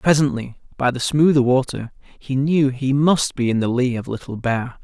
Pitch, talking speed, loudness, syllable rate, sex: 130 Hz, 200 wpm, -19 LUFS, 4.8 syllables/s, male